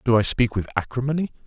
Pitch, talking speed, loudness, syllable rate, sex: 125 Hz, 205 wpm, -23 LUFS, 6.8 syllables/s, male